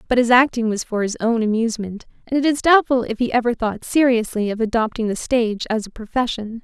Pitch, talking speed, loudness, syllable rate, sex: 230 Hz, 215 wpm, -19 LUFS, 6.0 syllables/s, female